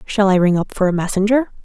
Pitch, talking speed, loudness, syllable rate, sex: 200 Hz, 255 wpm, -16 LUFS, 6.3 syllables/s, female